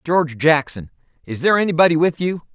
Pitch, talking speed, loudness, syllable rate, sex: 160 Hz, 165 wpm, -17 LUFS, 6.3 syllables/s, male